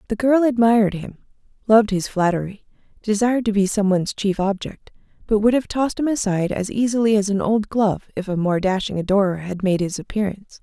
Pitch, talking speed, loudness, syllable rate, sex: 205 Hz, 200 wpm, -20 LUFS, 6.1 syllables/s, female